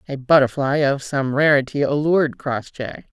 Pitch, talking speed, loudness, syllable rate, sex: 140 Hz, 130 wpm, -19 LUFS, 4.8 syllables/s, female